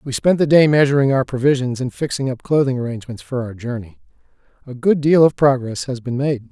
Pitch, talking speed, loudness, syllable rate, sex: 130 Hz, 210 wpm, -17 LUFS, 5.9 syllables/s, male